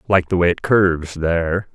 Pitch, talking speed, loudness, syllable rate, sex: 90 Hz, 205 wpm, -18 LUFS, 5.2 syllables/s, male